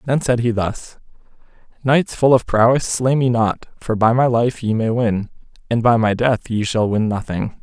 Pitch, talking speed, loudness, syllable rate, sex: 115 Hz, 205 wpm, -18 LUFS, 4.6 syllables/s, male